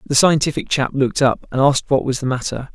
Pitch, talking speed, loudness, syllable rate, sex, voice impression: 135 Hz, 240 wpm, -18 LUFS, 6.3 syllables/s, male, masculine, very adult-like, slightly weak, soft, slightly halting, sincere, calm, slightly sweet, kind